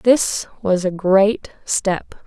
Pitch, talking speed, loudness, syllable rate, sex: 200 Hz, 135 wpm, -18 LUFS, 2.6 syllables/s, female